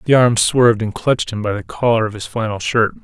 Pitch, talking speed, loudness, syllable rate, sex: 115 Hz, 255 wpm, -17 LUFS, 6.0 syllables/s, male